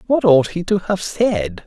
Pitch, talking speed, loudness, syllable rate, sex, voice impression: 175 Hz, 215 wpm, -17 LUFS, 4.0 syllables/s, male, masculine, adult-like, tensed, powerful, bright, slightly raspy, slightly mature, friendly, reassuring, kind, modest